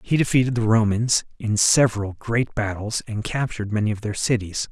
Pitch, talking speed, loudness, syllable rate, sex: 110 Hz, 180 wpm, -22 LUFS, 5.5 syllables/s, male